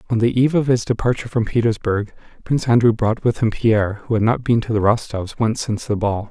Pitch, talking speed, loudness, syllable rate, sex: 115 Hz, 240 wpm, -19 LUFS, 6.4 syllables/s, male